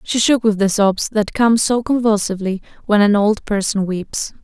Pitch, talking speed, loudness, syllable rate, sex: 210 Hz, 190 wpm, -16 LUFS, 4.8 syllables/s, female